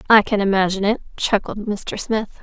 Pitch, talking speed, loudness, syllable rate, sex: 205 Hz, 175 wpm, -20 LUFS, 5.3 syllables/s, female